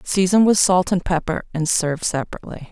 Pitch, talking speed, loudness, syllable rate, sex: 175 Hz, 175 wpm, -19 LUFS, 5.9 syllables/s, female